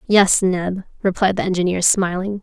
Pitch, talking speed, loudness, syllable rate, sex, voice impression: 190 Hz, 150 wpm, -18 LUFS, 4.7 syllables/s, female, slightly feminine, slightly young, slightly tensed, sincere, slightly friendly